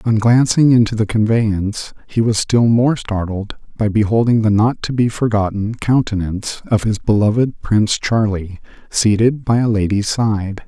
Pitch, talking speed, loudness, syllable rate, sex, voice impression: 110 Hz, 155 wpm, -16 LUFS, 4.7 syllables/s, male, masculine, adult-like, tensed, slightly bright, slightly soft, fluent, cool, intellectual, calm, wild, kind, modest